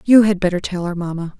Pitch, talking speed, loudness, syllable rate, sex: 185 Hz, 260 wpm, -18 LUFS, 6.2 syllables/s, female